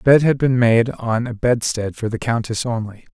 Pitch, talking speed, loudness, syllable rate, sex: 115 Hz, 230 wpm, -19 LUFS, 4.9 syllables/s, male